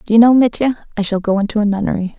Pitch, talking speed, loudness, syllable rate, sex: 215 Hz, 275 wpm, -15 LUFS, 7.1 syllables/s, female